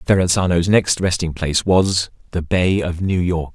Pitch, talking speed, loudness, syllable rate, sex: 90 Hz, 170 wpm, -18 LUFS, 4.7 syllables/s, male